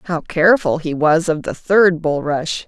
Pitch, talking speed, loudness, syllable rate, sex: 165 Hz, 180 wpm, -16 LUFS, 4.2 syllables/s, female